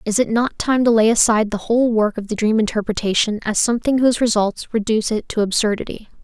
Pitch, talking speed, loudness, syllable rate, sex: 220 Hz, 210 wpm, -18 LUFS, 6.4 syllables/s, female